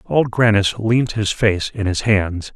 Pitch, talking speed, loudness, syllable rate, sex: 105 Hz, 190 wpm, -18 LUFS, 3.8 syllables/s, male